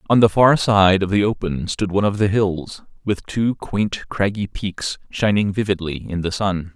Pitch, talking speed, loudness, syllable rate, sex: 100 Hz, 195 wpm, -19 LUFS, 4.5 syllables/s, male